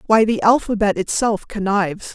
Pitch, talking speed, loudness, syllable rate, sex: 205 Hz, 140 wpm, -18 LUFS, 5.0 syllables/s, female